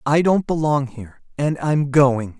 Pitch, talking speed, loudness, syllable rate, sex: 140 Hz, 175 wpm, -19 LUFS, 4.3 syllables/s, male